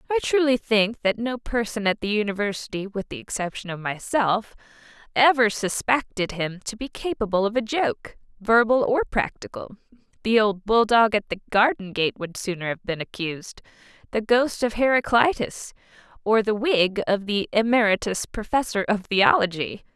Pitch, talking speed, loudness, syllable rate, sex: 215 Hz, 145 wpm, -23 LUFS, 5.0 syllables/s, female